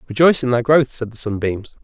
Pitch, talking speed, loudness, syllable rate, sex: 125 Hz, 230 wpm, -17 LUFS, 6.4 syllables/s, male